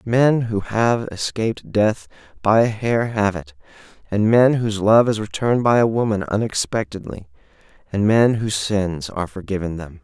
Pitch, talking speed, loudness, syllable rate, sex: 105 Hz, 160 wpm, -19 LUFS, 4.9 syllables/s, male